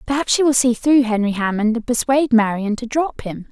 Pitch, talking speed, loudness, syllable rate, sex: 240 Hz, 220 wpm, -17 LUFS, 5.6 syllables/s, female